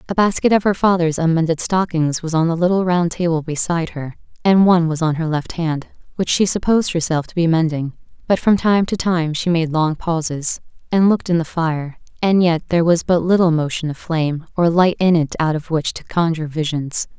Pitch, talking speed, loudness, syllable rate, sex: 170 Hz, 215 wpm, -18 LUFS, 5.5 syllables/s, female